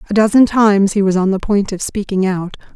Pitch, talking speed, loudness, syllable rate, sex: 200 Hz, 240 wpm, -14 LUFS, 5.9 syllables/s, female